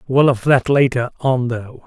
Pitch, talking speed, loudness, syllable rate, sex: 125 Hz, 195 wpm, -16 LUFS, 4.2 syllables/s, male